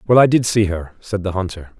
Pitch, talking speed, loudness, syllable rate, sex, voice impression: 100 Hz, 270 wpm, -18 LUFS, 5.8 syllables/s, male, very masculine, adult-like, slightly middle-aged, slightly thick, slightly tensed, slightly weak, bright, soft, clear, very fluent, cool, very intellectual, very refreshing, very sincere, calm, slightly mature, very friendly, very reassuring, unique, very elegant, wild, very sweet, lively, very kind, slightly modest